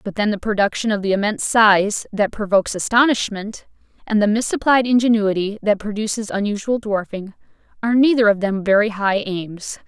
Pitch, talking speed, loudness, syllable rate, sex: 210 Hz, 160 wpm, -18 LUFS, 5.5 syllables/s, female